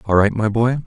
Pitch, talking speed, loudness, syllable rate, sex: 115 Hz, 275 wpm, -17 LUFS, 5.2 syllables/s, male